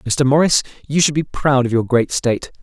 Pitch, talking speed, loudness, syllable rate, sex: 135 Hz, 230 wpm, -17 LUFS, 5.4 syllables/s, male